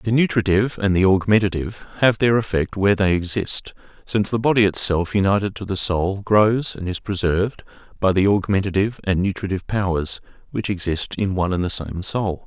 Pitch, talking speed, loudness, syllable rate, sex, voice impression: 100 Hz, 180 wpm, -20 LUFS, 5.8 syllables/s, male, masculine, adult-like, slightly hard, fluent, cool, intellectual, sincere, calm, slightly strict